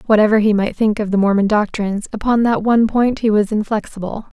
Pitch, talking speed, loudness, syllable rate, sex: 215 Hz, 205 wpm, -16 LUFS, 6.1 syllables/s, female